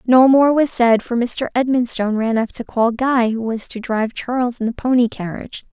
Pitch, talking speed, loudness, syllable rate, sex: 240 Hz, 220 wpm, -18 LUFS, 5.3 syllables/s, female